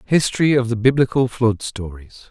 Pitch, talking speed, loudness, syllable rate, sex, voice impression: 120 Hz, 155 wpm, -18 LUFS, 5.1 syllables/s, male, very masculine, slightly old, thick, slightly tensed, slightly weak, slightly dark, soft, muffled, slightly fluent, slightly raspy, slightly cool, intellectual, slightly refreshing, sincere, calm, mature, slightly friendly, slightly reassuring, unique, slightly elegant, wild, slightly sweet, lively, very kind, modest